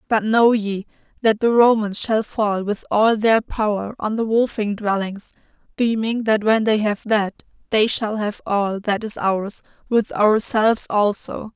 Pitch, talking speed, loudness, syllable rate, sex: 215 Hz, 165 wpm, -19 LUFS, 4.1 syllables/s, female